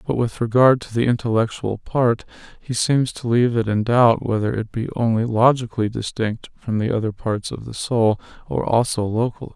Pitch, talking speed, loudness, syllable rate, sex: 115 Hz, 190 wpm, -20 LUFS, 5.2 syllables/s, male